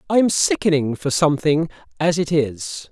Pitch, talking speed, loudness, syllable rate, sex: 160 Hz, 145 wpm, -19 LUFS, 4.5 syllables/s, male